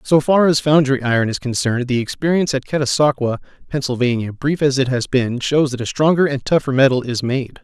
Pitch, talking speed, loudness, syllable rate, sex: 135 Hz, 205 wpm, -17 LUFS, 5.8 syllables/s, male